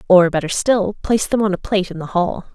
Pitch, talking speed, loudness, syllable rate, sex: 190 Hz, 260 wpm, -18 LUFS, 6.2 syllables/s, female